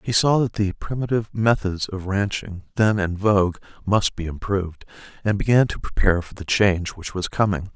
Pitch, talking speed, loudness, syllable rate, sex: 100 Hz, 185 wpm, -22 LUFS, 5.4 syllables/s, male